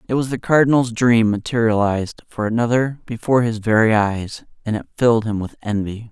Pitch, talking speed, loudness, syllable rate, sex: 115 Hz, 175 wpm, -18 LUFS, 5.7 syllables/s, male